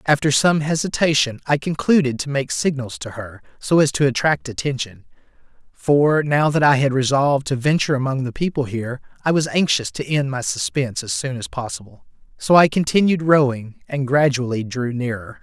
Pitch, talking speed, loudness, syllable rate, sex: 135 Hz, 180 wpm, -19 LUFS, 5.3 syllables/s, male